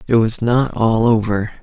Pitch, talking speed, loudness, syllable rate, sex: 115 Hz, 185 wpm, -16 LUFS, 4.4 syllables/s, male